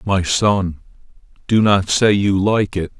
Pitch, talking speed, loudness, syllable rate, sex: 100 Hz, 160 wpm, -16 LUFS, 3.7 syllables/s, male